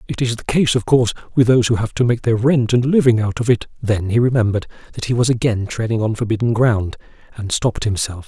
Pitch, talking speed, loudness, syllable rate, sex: 115 Hz, 240 wpm, -17 LUFS, 6.4 syllables/s, male